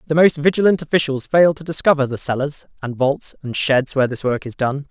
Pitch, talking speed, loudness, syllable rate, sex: 145 Hz, 220 wpm, -18 LUFS, 5.8 syllables/s, male